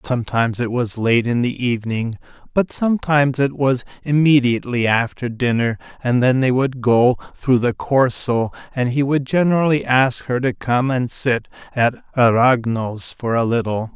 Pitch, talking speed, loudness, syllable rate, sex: 125 Hz, 160 wpm, -18 LUFS, 4.8 syllables/s, male